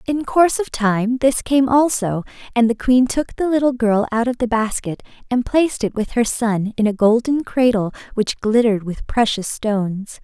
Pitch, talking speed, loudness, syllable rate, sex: 235 Hz, 195 wpm, -18 LUFS, 4.8 syllables/s, female